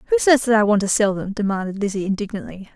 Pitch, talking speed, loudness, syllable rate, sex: 200 Hz, 240 wpm, -19 LUFS, 7.0 syllables/s, female